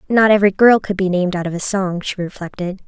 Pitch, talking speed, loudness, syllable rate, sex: 190 Hz, 250 wpm, -16 LUFS, 6.5 syllables/s, female